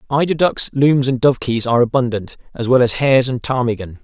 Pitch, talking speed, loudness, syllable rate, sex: 125 Hz, 195 wpm, -16 LUFS, 6.1 syllables/s, male